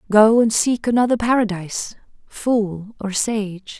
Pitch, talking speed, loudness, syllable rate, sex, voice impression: 215 Hz, 125 wpm, -19 LUFS, 4.1 syllables/s, female, very feminine, slightly young, adult-like, thin, tensed, powerful, bright, very hard, very clear, very fluent, slightly cute, cool, very intellectual, very refreshing, sincere, slightly calm, friendly, reassuring, unique, slightly elegant, wild, slightly sweet, lively, strict, intense, sharp